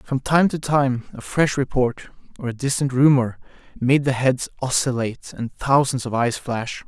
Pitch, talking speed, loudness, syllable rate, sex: 130 Hz, 175 wpm, -21 LUFS, 4.5 syllables/s, male